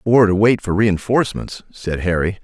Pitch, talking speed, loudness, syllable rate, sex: 100 Hz, 170 wpm, -17 LUFS, 4.9 syllables/s, male